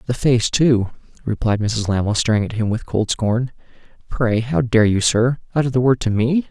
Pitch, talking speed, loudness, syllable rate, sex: 115 Hz, 205 wpm, -18 LUFS, 4.9 syllables/s, male